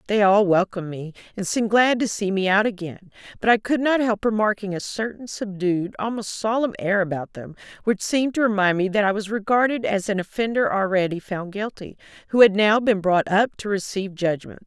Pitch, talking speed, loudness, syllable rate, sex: 205 Hz, 205 wpm, -22 LUFS, 5.5 syllables/s, female